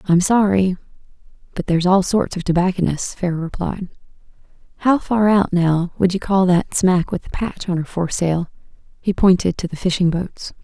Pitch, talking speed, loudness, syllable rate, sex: 180 Hz, 175 wpm, -18 LUFS, 5.2 syllables/s, female